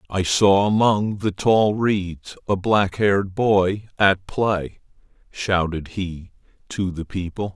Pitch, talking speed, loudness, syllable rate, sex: 100 Hz, 135 wpm, -20 LUFS, 3.4 syllables/s, male